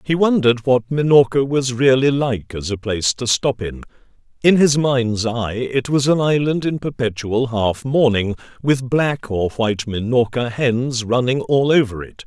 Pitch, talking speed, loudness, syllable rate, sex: 125 Hz, 170 wpm, -18 LUFS, 4.4 syllables/s, male